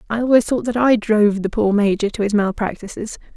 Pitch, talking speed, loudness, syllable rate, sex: 215 Hz, 215 wpm, -17 LUFS, 6.0 syllables/s, female